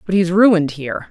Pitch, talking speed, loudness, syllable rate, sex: 175 Hz, 215 wpm, -15 LUFS, 6.1 syllables/s, female